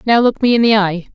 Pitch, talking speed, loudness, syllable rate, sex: 215 Hz, 315 wpm, -13 LUFS, 6.1 syllables/s, female